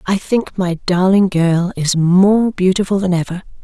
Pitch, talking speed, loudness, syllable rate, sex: 185 Hz, 165 wpm, -15 LUFS, 4.3 syllables/s, female